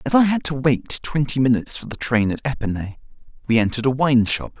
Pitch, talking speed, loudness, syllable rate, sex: 130 Hz, 220 wpm, -20 LUFS, 6.1 syllables/s, male